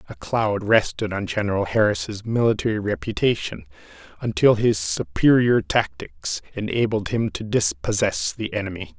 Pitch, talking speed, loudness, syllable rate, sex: 110 Hz, 120 wpm, -22 LUFS, 4.7 syllables/s, male